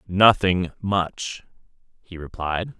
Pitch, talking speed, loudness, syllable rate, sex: 95 Hz, 85 wpm, -22 LUFS, 3.1 syllables/s, male